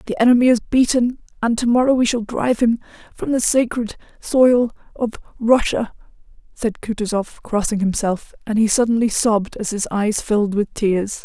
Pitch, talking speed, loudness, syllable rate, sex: 225 Hz, 160 wpm, -19 LUFS, 5.3 syllables/s, female